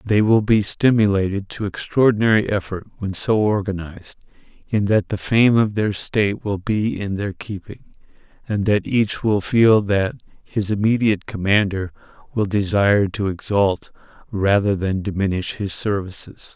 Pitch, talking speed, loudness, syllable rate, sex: 100 Hz, 145 wpm, -20 LUFS, 4.7 syllables/s, male